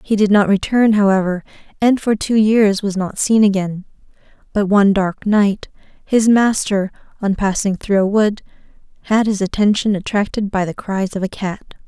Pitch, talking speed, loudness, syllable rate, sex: 205 Hz, 170 wpm, -16 LUFS, 4.8 syllables/s, female